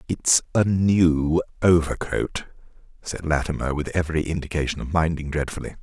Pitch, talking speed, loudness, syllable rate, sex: 80 Hz, 125 wpm, -23 LUFS, 5.0 syllables/s, male